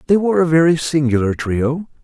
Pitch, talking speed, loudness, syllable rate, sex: 150 Hz, 175 wpm, -16 LUFS, 5.8 syllables/s, male